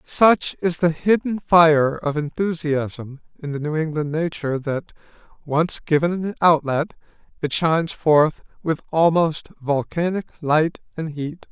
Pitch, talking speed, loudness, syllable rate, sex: 160 Hz, 135 wpm, -21 LUFS, 4.1 syllables/s, male